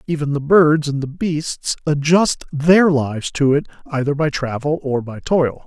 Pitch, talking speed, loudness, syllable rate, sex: 150 Hz, 180 wpm, -18 LUFS, 4.3 syllables/s, male